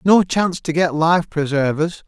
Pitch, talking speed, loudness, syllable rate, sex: 165 Hz, 175 wpm, -18 LUFS, 4.6 syllables/s, male